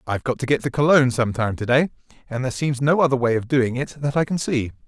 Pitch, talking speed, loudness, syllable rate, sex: 130 Hz, 285 wpm, -21 LUFS, 6.6 syllables/s, male